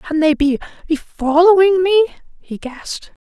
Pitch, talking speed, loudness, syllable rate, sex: 325 Hz, 130 wpm, -15 LUFS, 5.0 syllables/s, female